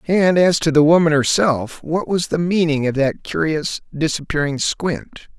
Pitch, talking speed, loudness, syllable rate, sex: 155 Hz, 165 wpm, -18 LUFS, 4.4 syllables/s, male